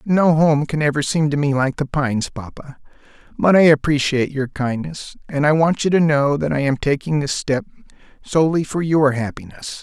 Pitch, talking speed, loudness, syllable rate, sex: 145 Hz, 195 wpm, -18 LUFS, 5.2 syllables/s, male